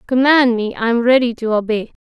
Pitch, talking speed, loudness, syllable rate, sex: 240 Hz, 205 wpm, -15 LUFS, 5.5 syllables/s, female